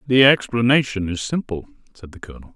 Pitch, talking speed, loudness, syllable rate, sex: 115 Hz, 165 wpm, -18 LUFS, 6.3 syllables/s, male